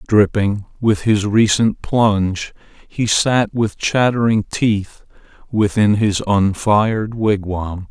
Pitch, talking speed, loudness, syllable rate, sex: 105 Hz, 105 wpm, -17 LUFS, 3.4 syllables/s, male